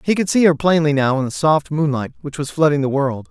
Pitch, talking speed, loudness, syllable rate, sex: 150 Hz, 270 wpm, -17 LUFS, 5.8 syllables/s, male